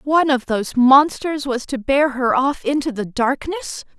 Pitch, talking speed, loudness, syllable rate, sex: 270 Hz, 180 wpm, -18 LUFS, 4.5 syllables/s, female